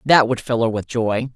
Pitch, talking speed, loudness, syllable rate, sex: 120 Hz, 265 wpm, -19 LUFS, 4.9 syllables/s, female